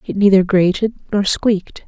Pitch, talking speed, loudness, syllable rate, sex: 195 Hz, 160 wpm, -16 LUFS, 5.0 syllables/s, female